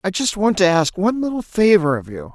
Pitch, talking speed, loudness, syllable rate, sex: 185 Hz, 255 wpm, -17 LUFS, 5.8 syllables/s, male